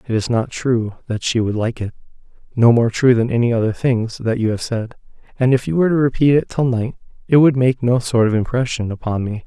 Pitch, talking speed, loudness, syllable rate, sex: 120 Hz, 235 wpm, -17 LUFS, 5.8 syllables/s, male